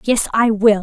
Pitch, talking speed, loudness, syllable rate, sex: 215 Hz, 220 wpm, -15 LUFS, 4.4 syllables/s, female